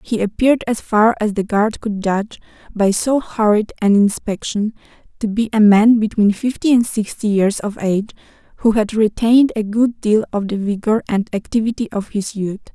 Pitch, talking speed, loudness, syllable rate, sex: 215 Hz, 185 wpm, -17 LUFS, 5.1 syllables/s, female